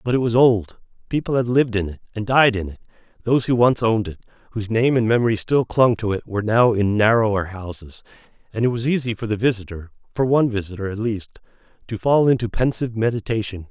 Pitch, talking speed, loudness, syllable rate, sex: 110 Hz, 200 wpm, -20 LUFS, 6.4 syllables/s, male